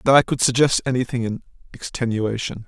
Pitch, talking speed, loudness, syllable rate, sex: 120 Hz, 155 wpm, -20 LUFS, 5.9 syllables/s, male